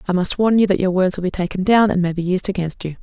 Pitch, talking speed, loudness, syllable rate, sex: 185 Hz, 335 wpm, -18 LUFS, 6.7 syllables/s, female